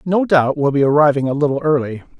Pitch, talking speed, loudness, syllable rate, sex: 150 Hz, 220 wpm, -15 LUFS, 6.2 syllables/s, male